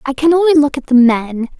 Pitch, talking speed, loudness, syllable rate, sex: 280 Hz, 265 wpm, -12 LUFS, 5.7 syllables/s, female